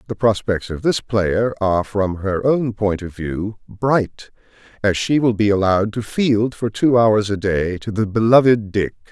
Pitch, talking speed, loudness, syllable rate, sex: 105 Hz, 190 wpm, -18 LUFS, 4.3 syllables/s, male